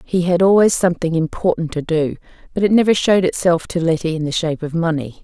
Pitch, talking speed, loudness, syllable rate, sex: 170 Hz, 220 wpm, -17 LUFS, 6.3 syllables/s, female